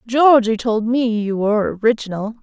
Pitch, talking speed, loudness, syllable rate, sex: 225 Hz, 150 wpm, -17 LUFS, 4.9 syllables/s, female